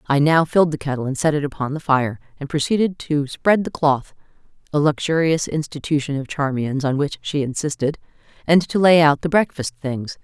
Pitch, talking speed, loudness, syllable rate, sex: 150 Hz, 195 wpm, -20 LUFS, 4.6 syllables/s, female